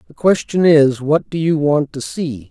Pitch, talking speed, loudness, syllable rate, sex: 150 Hz, 215 wpm, -16 LUFS, 4.3 syllables/s, male